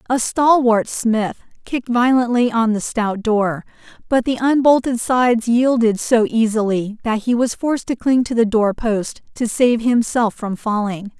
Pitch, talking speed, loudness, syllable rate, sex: 230 Hz, 165 wpm, -17 LUFS, 4.4 syllables/s, female